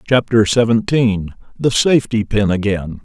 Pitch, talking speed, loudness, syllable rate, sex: 110 Hz, 120 wpm, -15 LUFS, 4.5 syllables/s, male